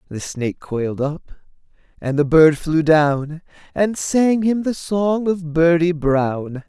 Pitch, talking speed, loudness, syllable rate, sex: 160 Hz, 155 wpm, -18 LUFS, 3.6 syllables/s, male